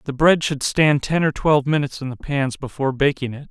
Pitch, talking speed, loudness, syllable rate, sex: 140 Hz, 240 wpm, -20 LUFS, 6.0 syllables/s, male